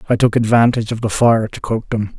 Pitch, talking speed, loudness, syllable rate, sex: 110 Hz, 245 wpm, -16 LUFS, 6.0 syllables/s, male